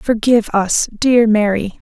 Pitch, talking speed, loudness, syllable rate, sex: 220 Hz, 125 wpm, -14 LUFS, 4.1 syllables/s, female